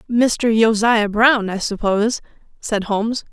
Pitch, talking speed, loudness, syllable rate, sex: 220 Hz, 125 wpm, -17 LUFS, 4.1 syllables/s, female